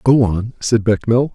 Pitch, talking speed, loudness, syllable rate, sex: 115 Hz, 180 wpm, -16 LUFS, 5.0 syllables/s, male